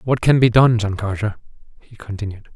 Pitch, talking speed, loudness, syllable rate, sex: 110 Hz, 190 wpm, -17 LUFS, 5.6 syllables/s, male